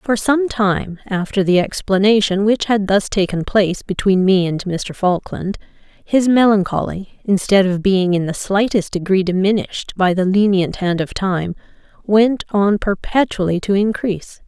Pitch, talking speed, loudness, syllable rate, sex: 195 Hz, 155 wpm, -17 LUFS, 4.5 syllables/s, female